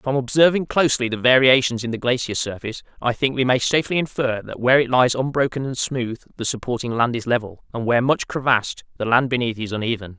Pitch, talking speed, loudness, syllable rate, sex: 125 Hz, 210 wpm, -20 LUFS, 6.3 syllables/s, male